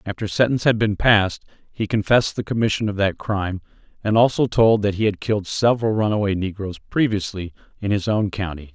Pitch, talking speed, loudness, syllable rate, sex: 105 Hz, 185 wpm, -20 LUFS, 6.0 syllables/s, male